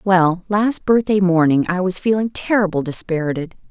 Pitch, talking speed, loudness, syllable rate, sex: 185 Hz, 145 wpm, -17 LUFS, 5.0 syllables/s, female